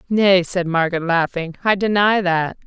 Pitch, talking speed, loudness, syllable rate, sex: 185 Hz, 155 wpm, -18 LUFS, 4.6 syllables/s, female